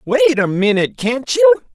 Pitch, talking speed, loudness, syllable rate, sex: 200 Hz, 170 wpm, -15 LUFS, 4.9 syllables/s, male